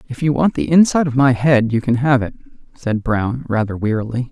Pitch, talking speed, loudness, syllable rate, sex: 125 Hz, 220 wpm, -16 LUFS, 5.7 syllables/s, male